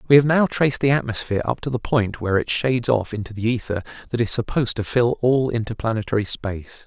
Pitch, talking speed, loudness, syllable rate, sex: 115 Hz, 220 wpm, -21 LUFS, 6.5 syllables/s, male